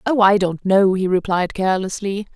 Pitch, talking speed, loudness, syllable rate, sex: 195 Hz, 180 wpm, -18 LUFS, 5.1 syllables/s, female